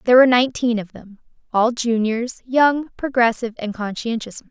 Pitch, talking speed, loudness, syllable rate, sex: 235 Hz, 160 wpm, -19 LUFS, 5.6 syllables/s, female